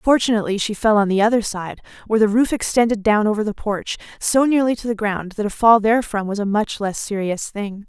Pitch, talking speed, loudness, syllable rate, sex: 215 Hz, 230 wpm, -19 LUFS, 5.9 syllables/s, female